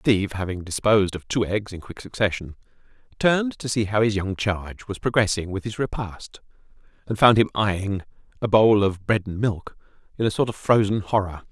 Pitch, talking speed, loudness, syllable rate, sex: 105 Hz, 195 wpm, -23 LUFS, 5.4 syllables/s, male